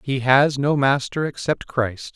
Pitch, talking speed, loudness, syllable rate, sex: 135 Hz, 165 wpm, -20 LUFS, 3.9 syllables/s, male